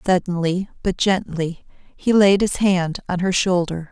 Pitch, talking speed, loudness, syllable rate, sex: 180 Hz, 155 wpm, -19 LUFS, 4.1 syllables/s, female